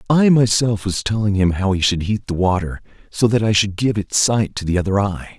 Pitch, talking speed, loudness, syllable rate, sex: 105 Hz, 245 wpm, -18 LUFS, 5.4 syllables/s, male